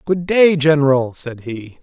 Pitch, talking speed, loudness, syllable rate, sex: 145 Hz, 165 wpm, -14 LUFS, 4.1 syllables/s, male